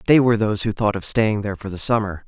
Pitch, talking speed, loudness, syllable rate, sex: 105 Hz, 290 wpm, -20 LUFS, 7.1 syllables/s, male